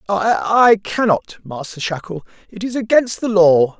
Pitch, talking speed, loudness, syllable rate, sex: 195 Hz, 140 wpm, -16 LUFS, 4.4 syllables/s, male